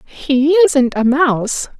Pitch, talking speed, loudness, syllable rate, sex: 280 Hz, 135 wpm, -14 LUFS, 3.3 syllables/s, female